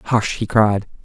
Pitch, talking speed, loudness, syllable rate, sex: 105 Hz, 175 wpm, -18 LUFS, 3.5 syllables/s, male